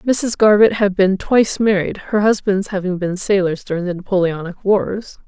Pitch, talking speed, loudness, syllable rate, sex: 195 Hz, 170 wpm, -17 LUFS, 4.8 syllables/s, female